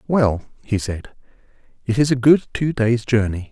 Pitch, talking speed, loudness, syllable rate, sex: 120 Hz, 170 wpm, -19 LUFS, 4.5 syllables/s, male